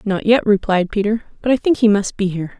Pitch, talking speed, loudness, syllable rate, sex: 210 Hz, 255 wpm, -17 LUFS, 6.1 syllables/s, female